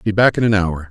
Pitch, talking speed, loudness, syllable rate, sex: 100 Hz, 330 wpm, -16 LUFS, 5.8 syllables/s, male